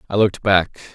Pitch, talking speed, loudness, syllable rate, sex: 100 Hz, 190 wpm, -17 LUFS, 6.5 syllables/s, male